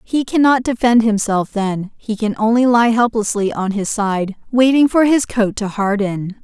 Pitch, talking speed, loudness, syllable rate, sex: 225 Hz, 175 wpm, -16 LUFS, 4.4 syllables/s, female